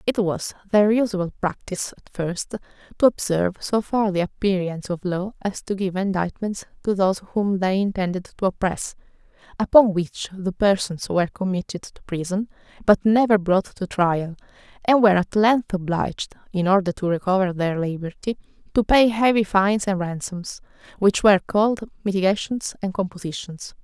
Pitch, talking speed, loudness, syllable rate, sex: 195 Hz, 155 wpm, -22 LUFS, 5.2 syllables/s, female